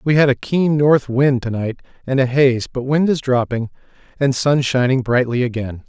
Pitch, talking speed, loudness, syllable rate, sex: 130 Hz, 205 wpm, -17 LUFS, 4.7 syllables/s, male